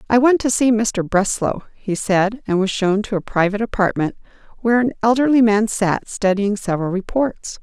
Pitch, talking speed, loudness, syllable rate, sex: 210 Hz, 180 wpm, -18 LUFS, 5.2 syllables/s, female